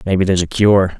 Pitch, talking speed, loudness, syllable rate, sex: 95 Hz, 240 wpm, -14 LUFS, 7.1 syllables/s, male